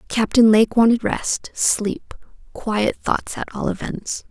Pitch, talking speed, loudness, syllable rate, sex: 220 Hz, 110 wpm, -19 LUFS, 3.6 syllables/s, female